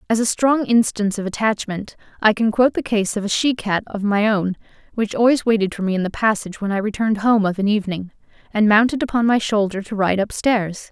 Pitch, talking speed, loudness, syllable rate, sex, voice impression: 210 Hz, 225 wpm, -19 LUFS, 6.0 syllables/s, female, feminine, adult-like, tensed, powerful, hard, clear, fluent, intellectual, calm, slightly unique, lively, sharp